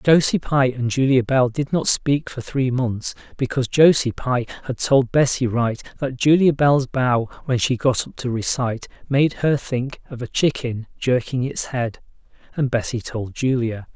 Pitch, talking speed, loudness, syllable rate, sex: 130 Hz, 175 wpm, -20 LUFS, 4.4 syllables/s, male